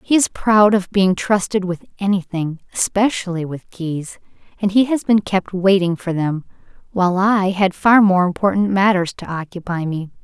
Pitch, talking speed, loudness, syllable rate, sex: 190 Hz, 170 wpm, -18 LUFS, 4.7 syllables/s, female